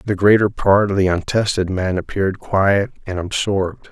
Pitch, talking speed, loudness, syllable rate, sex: 95 Hz, 170 wpm, -18 LUFS, 5.0 syllables/s, male